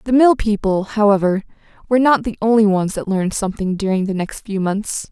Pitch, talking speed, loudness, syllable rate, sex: 205 Hz, 200 wpm, -17 LUFS, 5.8 syllables/s, female